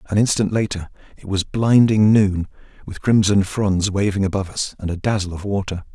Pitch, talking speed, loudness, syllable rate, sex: 100 Hz, 180 wpm, -19 LUFS, 5.3 syllables/s, male